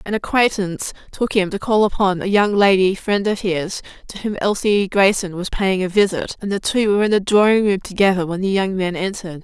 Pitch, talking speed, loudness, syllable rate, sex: 195 Hz, 225 wpm, -18 LUFS, 5.6 syllables/s, female